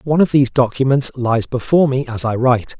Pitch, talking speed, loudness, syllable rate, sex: 130 Hz, 215 wpm, -16 LUFS, 6.5 syllables/s, male